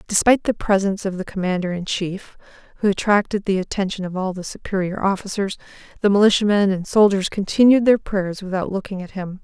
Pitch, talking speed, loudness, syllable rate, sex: 195 Hz, 180 wpm, -20 LUFS, 6.0 syllables/s, female